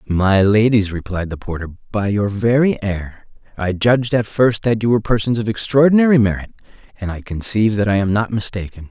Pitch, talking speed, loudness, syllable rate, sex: 105 Hz, 190 wpm, -17 LUFS, 5.5 syllables/s, male